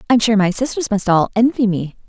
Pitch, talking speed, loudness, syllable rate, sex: 215 Hz, 260 wpm, -16 LUFS, 6.3 syllables/s, female